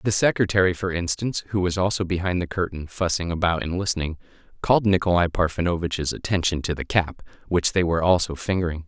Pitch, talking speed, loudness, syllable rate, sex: 90 Hz, 175 wpm, -23 LUFS, 6.3 syllables/s, male